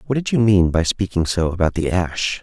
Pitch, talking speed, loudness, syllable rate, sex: 95 Hz, 250 wpm, -19 LUFS, 5.3 syllables/s, male